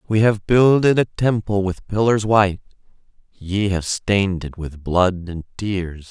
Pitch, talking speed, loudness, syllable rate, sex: 100 Hz, 155 wpm, -19 LUFS, 4.2 syllables/s, male